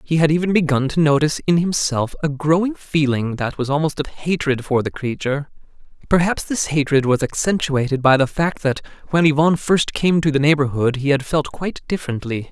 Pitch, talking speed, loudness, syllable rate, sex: 150 Hz, 190 wpm, -19 LUFS, 5.5 syllables/s, male